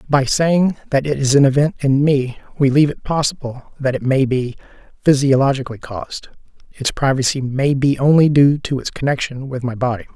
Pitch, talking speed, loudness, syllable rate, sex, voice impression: 135 Hz, 185 wpm, -17 LUFS, 5.5 syllables/s, male, masculine, slightly middle-aged, thick, slightly cool, sincere, calm, slightly mature